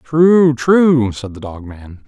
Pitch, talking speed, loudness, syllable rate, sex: 130 Hz, 175 wpm, -12 LUFS, 3.0 syllables/s, male